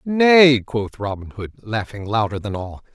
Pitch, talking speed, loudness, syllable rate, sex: 115 Hz, 165 wpm, -19 LUFS, 4.2 syllables/s, male